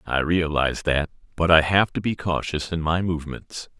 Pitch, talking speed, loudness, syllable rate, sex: 80 Hz, 190 wpm, -22 LUFS, 5.1 syllables/s, male